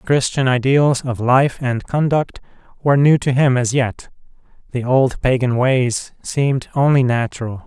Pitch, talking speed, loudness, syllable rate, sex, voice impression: 130 Hz, 155 wpm, -17 LUFS, 4.5 syllables/s, male, masculine, very adult-like, cool, sincere, slightly calm, reassuring